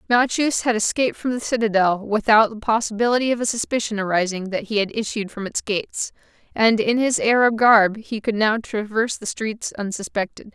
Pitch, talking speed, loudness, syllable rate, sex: 220 Hz, 180 wpm, -20 LUFS, 5.5 syllables/s, female